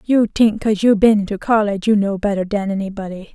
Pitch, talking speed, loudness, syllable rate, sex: 205 Hz, 215 wpm, -17 LUFS, 6.1 syllables/s, female